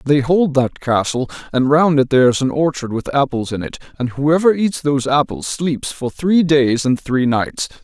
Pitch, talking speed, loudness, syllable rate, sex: 140 Hz, 205 wpm, -17 LUFS, 4.8 syllables/s, male